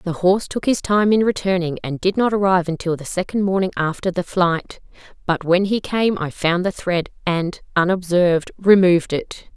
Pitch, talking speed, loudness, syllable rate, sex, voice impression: 180 Hz, 190 wpm, -19 LUFS, 5.1 syllables/s, female, feminine, adult-like, tensed, slightly dark, slightly hard, clear, fluent, intellectual, calm, slightly unique, elegant, strict, sharp